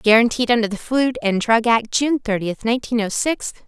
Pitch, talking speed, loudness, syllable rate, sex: 230 Hz, 195 wpm, -19 LUFS, 5.3 syllables/s, female